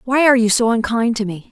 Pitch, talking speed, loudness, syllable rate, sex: 235 Hz, 275 wpm, -16 LUFS, 6.5 syllables/s, female